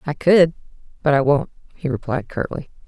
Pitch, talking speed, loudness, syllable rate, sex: 150 Hz, 165 wpm, -19 LUFS, 5.4 syllables/s, female